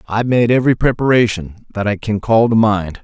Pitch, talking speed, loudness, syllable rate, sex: 110 Hz, 200 wpm, -15 LUFS, 5.7 syllables/s, male